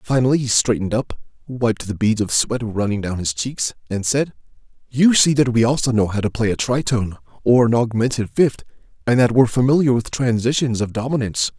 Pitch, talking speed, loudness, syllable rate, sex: 120 Hz, 195 wpm, -19 LUFS, 5.6 syllables/s, male